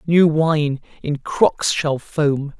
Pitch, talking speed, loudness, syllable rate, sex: 150 Hz, 140 wpm, -19 LUFS, 2.7 syllables/s, male